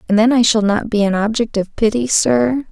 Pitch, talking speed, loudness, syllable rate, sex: 225 Hz, 245 wpm, -15 LUFS, 5.3 syllables/s, female